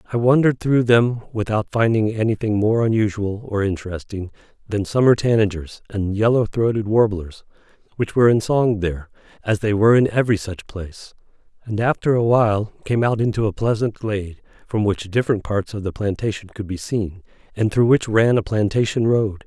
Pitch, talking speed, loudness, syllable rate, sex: 110 Hz, 175 wpm, -20 LUFS, 5.5 syllables/s, male